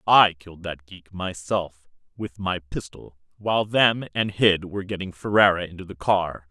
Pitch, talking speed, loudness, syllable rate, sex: 95 Hz, 165 wpm, -23 LUFS, 4.6 syllables/s, male